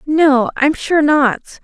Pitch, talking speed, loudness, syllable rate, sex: 285 Hz, 145 wpm, -14 LUFS, 3.2 syllables/s, female